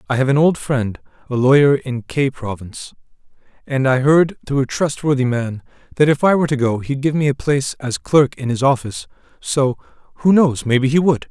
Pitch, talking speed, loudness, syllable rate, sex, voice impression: 135 Hz, 205 wpm, -17 LUFS, 5.5 syllables/s, male, masculine, adult-like, intellectual, calm, slightly sweet